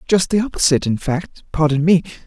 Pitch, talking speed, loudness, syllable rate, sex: 160 Hz, 160 wpm, -17 LUFS, 5.9 syllables/s, male